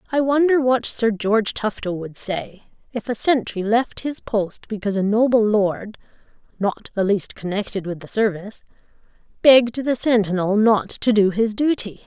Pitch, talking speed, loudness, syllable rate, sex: 220 Hz, 165 wpm, -20 LUFS, 4.0 syllables/s, female